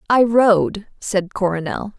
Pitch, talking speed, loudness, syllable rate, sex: 200 Hz, 120 wpm, -18 LUFS, 3.5 syllables/s, female